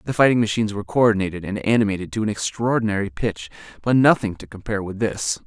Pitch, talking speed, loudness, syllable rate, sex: 105 Hz, 185 wpm, -21 LUFS, 6.8 syllables/s, male